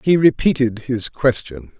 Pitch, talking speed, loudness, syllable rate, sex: 130 Hz, 135 wpm, -18 LUFS, 4.2 syllables/s, male